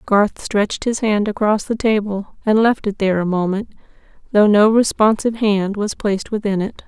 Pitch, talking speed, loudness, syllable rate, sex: 210 Hz, 185 wpm, -17 LUFS, 5.2 syllables/s, female